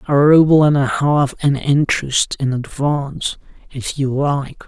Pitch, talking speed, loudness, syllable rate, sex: 140 Hz, 155 wpm, -16 LUFS, 4.2 syllables/s, male